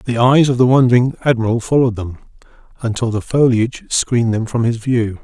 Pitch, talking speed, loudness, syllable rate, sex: 120 Hz, 185 wpm, -15 LUFS, 5.9 syllables/s, male